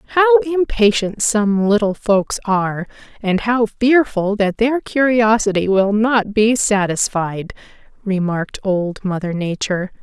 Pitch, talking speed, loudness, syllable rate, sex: 215 Hz, 120 wpm, -17 LUFS, 4.1 syllables/s, female